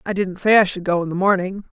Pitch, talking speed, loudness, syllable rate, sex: 190 Hz, 300 wpm, -18 LUFS, 6.4 syllables/s, female